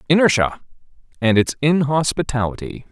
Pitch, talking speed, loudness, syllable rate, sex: 135 Hz, 80 wpm, -18 LUFS, 5.3 syllables/s, male